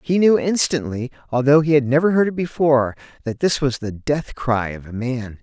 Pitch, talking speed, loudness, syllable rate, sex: 135 Hz, 210 wpm, -19 LUFS, 5.2 syllables/s, male